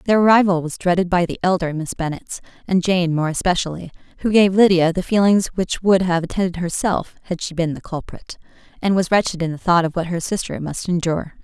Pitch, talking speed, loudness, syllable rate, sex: 180 Hz, 210 wpm, -19 LUFS, 5.8 syllables/s, female